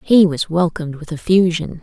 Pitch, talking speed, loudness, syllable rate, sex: 170 Hz, 165 wpm, -16 LUFS, 5.2 syllables/s, female